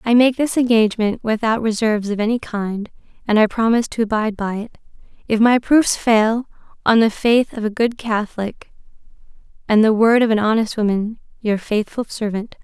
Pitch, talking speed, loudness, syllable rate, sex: 220 Hz, 165 wpm, -18 LUFS, 5.3 syllables/s, female